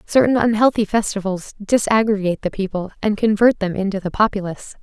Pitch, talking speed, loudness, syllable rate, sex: 205 Hz, 150 wpm, -18 LUFS, 6.1 syllables/s, female